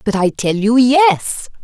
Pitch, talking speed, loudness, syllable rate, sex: 215 Hz, 185 wpm, -14 LUFS, 3.5 syllables/s, female